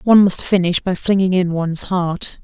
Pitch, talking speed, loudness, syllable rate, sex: 185 Hz, 195 wpm, -17 LUFS, 5.2 syllables/s, female